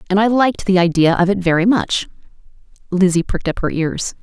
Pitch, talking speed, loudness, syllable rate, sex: 185 Hz, 200 wpm, -16 LUFS, 6.1 syllables/s, female